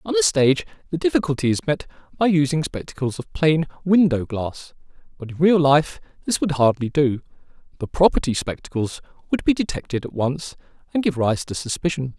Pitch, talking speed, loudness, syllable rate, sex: 155 Hz, 170 wpm, -21 LUFS, 5.5 syllables/s, male